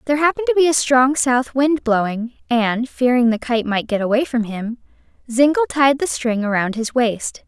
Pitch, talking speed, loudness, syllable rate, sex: 250 Hz, 200 wpm, -18 LUFS, 5.0 syllables/s, female